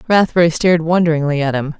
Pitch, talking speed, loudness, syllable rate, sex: 160 Hz, 165 wpm, -15 LUFS, 6.9 syllables/s, female